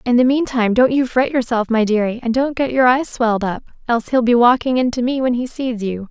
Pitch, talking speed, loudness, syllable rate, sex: 245 Hz, 255 wpm, -17 LUFS, 5.9 syllables/s, female